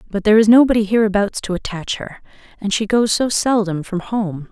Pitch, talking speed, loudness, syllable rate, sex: 205 Hz, 200 wpm, -17 LUFS, 5.6 syllables/s, female